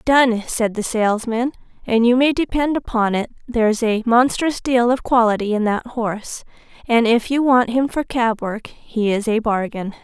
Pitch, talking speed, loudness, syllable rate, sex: 235 Hz, 180 wpm, -18 LUFS, 4.6 syllables/s, female